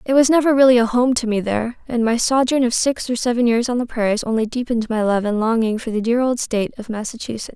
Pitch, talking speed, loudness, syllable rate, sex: 235 Hz, 255 wpm, -18 LUFS, 6.3 syllables/s, female